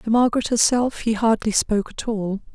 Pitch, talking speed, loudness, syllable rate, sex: 220 Hz, 190 wpm, -21 LUFS, 5.4 syllables/s, female